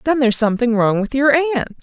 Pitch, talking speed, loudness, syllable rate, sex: 255 Hz, 230 wpm, -16 LUFS, 6.0 syllables/s, female